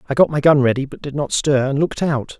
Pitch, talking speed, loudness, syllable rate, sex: 140 Hz, 300 wpm, -18 LUFS, 6.4 syllables/s, male